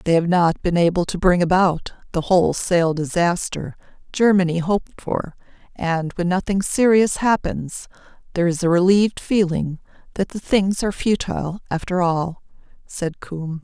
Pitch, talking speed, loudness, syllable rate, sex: 180 Hz, 145 wpm, -20 LUFS, 4.9 syllables/s, female